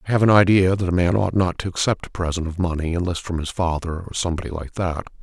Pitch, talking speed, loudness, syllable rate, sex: 90 Hz, 265 wpm, -21 LUFS, 6.6 syllables/s, male